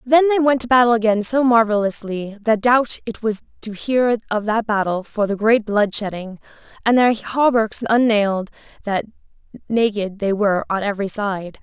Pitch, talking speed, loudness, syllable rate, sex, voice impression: 220 Hz, 170 wpm, -18 LUFS, 5.0 syllables/s, female, feminine, adult-like, tensed, bright, soft, intellectual, friendly, elegant, lively, kind